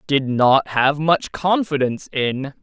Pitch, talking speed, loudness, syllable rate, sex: 145 Hz, 135 wpm, -19 LUFS, 3.7 syllables/s, male